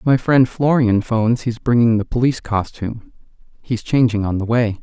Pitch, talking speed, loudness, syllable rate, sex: 115 Hz, 175 wpm, -17 LUFS, 5.2 syllables/s, male